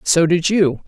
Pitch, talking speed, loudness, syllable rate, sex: 170 Hz, 205 wpm, -16 LUFS, 3.9 syllables/s, female